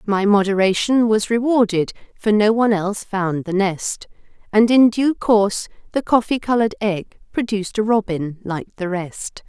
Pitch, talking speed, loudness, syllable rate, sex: 205 Hz, 160 wpm, -19 LUFS, 4.7 syllables/s, female